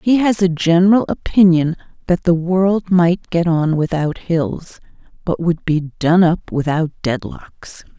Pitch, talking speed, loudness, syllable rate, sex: 170 Hz, 150 wpm, -16 LUFS, 4.1 syllables/s, female